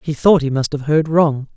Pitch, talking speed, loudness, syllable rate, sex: 150 Hz, 270 wpm, -16 LUFS, 4.9 syllables/s, male